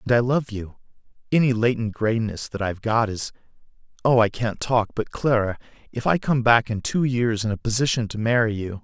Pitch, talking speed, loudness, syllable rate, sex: 115 Hz, 195 wpm, -22 LUFS, 5.4 syllables/s, male